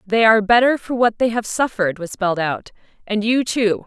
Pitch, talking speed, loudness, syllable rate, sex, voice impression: 220 Hz, 220 wpm, -18 LUFS, 5.6 syllables/s, female, very feminine, slightly young, adult-like, very thin, very tensed, very powerful, very bright, hard, very clear, very fluent, slightly raspy, cute, slightly cool, intellectual, very refreshing, sincere, slightly calm, very friendly, very reassuring, very unique, elegant, wild, sweet, very lively, kind, intense, very light